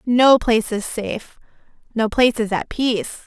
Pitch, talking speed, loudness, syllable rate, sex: 230 Hz, 145 wpm, -19 LUFS, 5.2 syllables/s, female